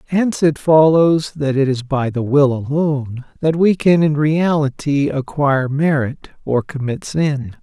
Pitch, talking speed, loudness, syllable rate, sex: 145 Hz, 155 wpm, -16 LUFS, 4.2 syllables/s, male